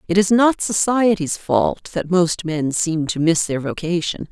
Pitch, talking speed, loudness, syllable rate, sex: 170 Hz, 180 wpm, -19 LUFS, 4.2 syllables/s, female